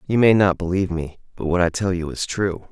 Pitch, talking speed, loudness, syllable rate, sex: 90 Hz, 265 wpm, -21 LUFS, 6.0 syllables/s, male